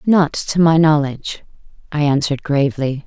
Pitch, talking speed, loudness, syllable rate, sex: 150 Hz, 135 wpm, -16 LUFS, 5.2 syllables/s, female